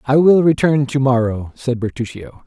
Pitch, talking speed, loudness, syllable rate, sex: 130 Hz, 170 wpm, -16 LUFS, 4.7 syllables/s, male